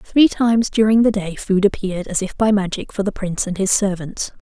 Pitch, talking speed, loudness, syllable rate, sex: 200 Hz, 230 wpm, -18 LUFS, 5.6 syllables/s, female